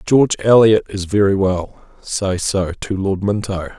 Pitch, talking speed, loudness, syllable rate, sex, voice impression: 100 Hz, 160 wpm, -17 LUFS, 4.3 syllables/s, male, very masculine, very adult-like, slightly thick, cool, slightly intellectual, slightly calm